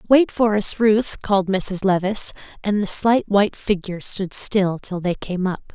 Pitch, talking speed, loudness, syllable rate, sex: 200 Hz, 190 wpm, -19 LUFS, 4.6 syllables/s, female